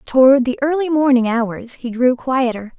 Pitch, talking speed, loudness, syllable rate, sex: 260 Hz, 170 wpm, -16 LUFS, 4.5 syllables/s, female